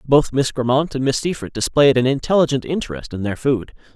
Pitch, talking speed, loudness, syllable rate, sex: 130 Hz, 195 wpm, -19 LUFS, 5.8 syllables/s, male